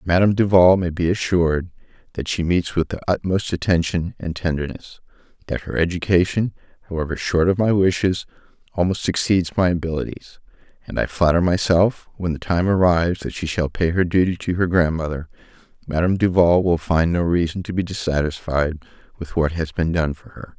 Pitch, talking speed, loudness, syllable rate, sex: 85 Hz, 175 wpm, -20 LUFS, 5.5 syllables/s, male